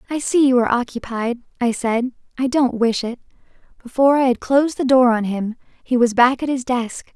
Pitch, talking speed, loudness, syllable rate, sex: 250 Hz, 210 wpm, -18 LUFS, 5.5 syllables/s, female